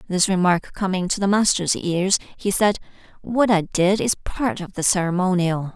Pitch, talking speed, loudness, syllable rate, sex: 185 Hz, 175 wpm, -20 LUFS, 4.7 syllables/s, female